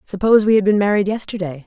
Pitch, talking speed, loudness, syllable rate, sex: 200 Hz, 215 wpm, -16 LUFS, 7.0 syllables/s, female